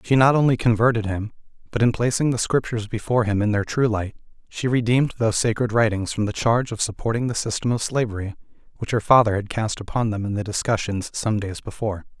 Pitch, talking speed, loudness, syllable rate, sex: 110 Hz, 210 wpm, -22 LUFS, 6.3 syllables/s, male